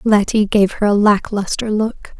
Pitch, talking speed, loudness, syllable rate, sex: 210 Hz, 190 wpm, -16 LUFS, 4.3 syllables/s, female